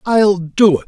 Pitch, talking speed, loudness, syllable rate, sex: 180 Hz, 205 wpm, -14 LUFS, 4.3 syllables/s, male